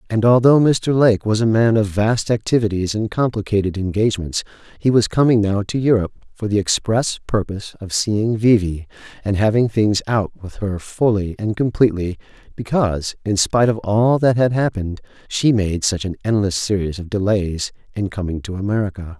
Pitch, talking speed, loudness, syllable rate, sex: 105 Hz, 175 wpm, -18 LUFS, 5.3 syllables/s, male